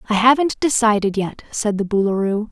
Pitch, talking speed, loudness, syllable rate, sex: 215 Hz, 165 wpm, -18 LUFS, 5.4 syllables/s, female